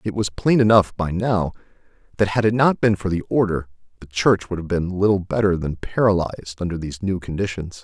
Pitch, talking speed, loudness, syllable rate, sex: 95 Hz, 205 wpm, -21 LUFS, 5.6 syllables/s, male